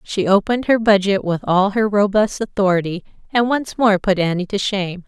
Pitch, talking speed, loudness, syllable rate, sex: 200 Hz, 190 wpm, -17 LUFS, 5.3 syllables/s, female